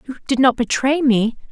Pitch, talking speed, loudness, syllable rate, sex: 255 Hz, 200 wpm, -17 LUFS, 5.0 syllables/s, female